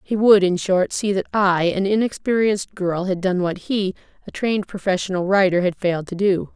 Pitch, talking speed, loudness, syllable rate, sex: 190 Hz, 200 wpm, -20 LUFS, 5.3 syllables/s, female